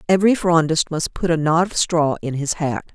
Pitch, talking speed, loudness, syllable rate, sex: 165 Hz, 225 wpm, -19 LUFS, 5.3 syllables/s, female